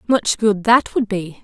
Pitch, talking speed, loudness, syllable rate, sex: 205 Hz, 210 wpm, -17 LUFS, 3.9 syllables/s, female